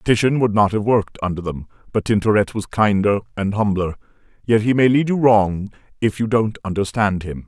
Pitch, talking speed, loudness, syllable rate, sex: 105 Hz, 195 wpm, -19 LUFS, 5.4 syllables/s, male